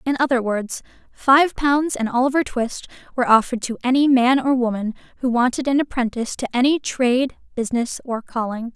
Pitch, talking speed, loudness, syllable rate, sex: 250 Hz, 170 wpm, -20 LUFS, 5.6 syllables/s, female